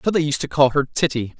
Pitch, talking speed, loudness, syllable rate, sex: 145 Hz, 300 wpm, -19 LUFS, 6.6 syllables/s, male